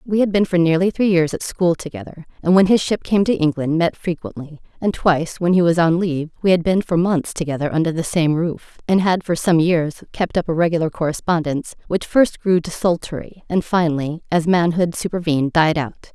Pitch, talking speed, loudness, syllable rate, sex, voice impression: 170 Hz, 210 wpm, -18 LUFS, 5.5 syllables/s, female, very feminine, adult-like, slightly middle-aged, thin, slightly tensed, slightly weak, bright, hard, clear, slightly fluent, cool, very intellectual, very refreshing, sincere, very calm, friendly, very reassuring, unique, very elegant, slightly wild, sweet, lively, slightly strict, slightly intense